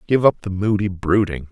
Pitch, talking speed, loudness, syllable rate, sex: 95 Hz, 200 wpm, -19 LUFS, 5.1 syllables/s, male